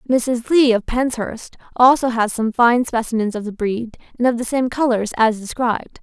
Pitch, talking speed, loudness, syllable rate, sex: 235 Hz, 190 wpm, -18 LUFS, 4.8 syllables/s, female